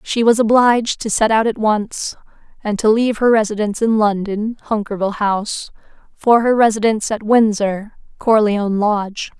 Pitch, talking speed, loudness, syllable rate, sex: 215 Hz, 155 wpm, -16 LUFS, 5.2 syllables/s, female